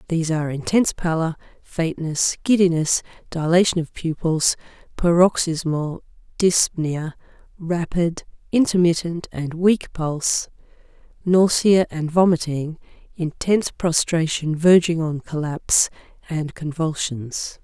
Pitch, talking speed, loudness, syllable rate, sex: 165 Hz, 90 wpm, -20 LUFS, 4.3 syllables/s, female